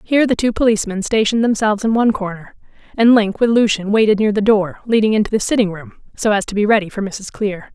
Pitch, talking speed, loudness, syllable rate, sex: 215 Hz, 230 wpm, -16 LUFS, 6.5 syllables/s, female